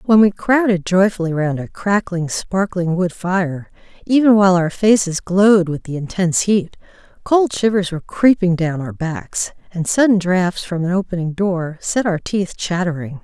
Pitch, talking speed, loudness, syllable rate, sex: 185 Hz, 170 wpm, -17 LUFS, 4.7 syllables/s, female